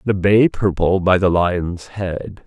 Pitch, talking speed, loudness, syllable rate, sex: 95 Hz, 170 wpm, -17 LUFS, 3.5 syllables/s, male